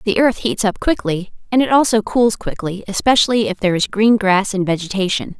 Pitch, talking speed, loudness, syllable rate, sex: 210 Hz, 200 wpm, -17 LUFS, 5.6 syllables/s, female